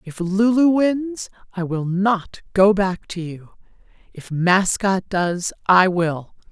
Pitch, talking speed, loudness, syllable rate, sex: 190 Hz, 145 wpm, -19 LUFS, 3.2 syllables/s, female